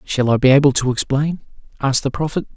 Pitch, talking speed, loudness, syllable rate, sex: 140 Hz, 210 wpm, -17 LUFS, 6.5 syllables/s, male